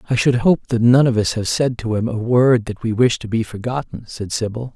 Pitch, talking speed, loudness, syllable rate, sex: 115 Hz, 265 wpm, -18 LUFS, 5.5 syllables/s, male